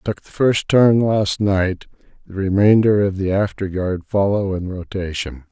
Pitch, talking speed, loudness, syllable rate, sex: 95 Hz, 165 wpm, -18 LUFS, 4.4 syllables/s, male